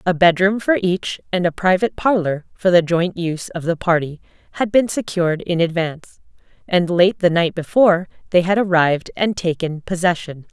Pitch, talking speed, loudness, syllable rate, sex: 175 Hz, 175 wpm, -18 LUFS, 5.3 syllables/s, female